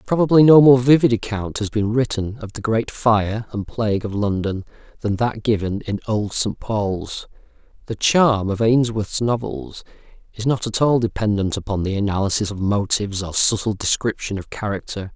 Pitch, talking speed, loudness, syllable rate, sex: 110 Hz, 170 wpm, -19 LUFS, 4.9 syllables/s, male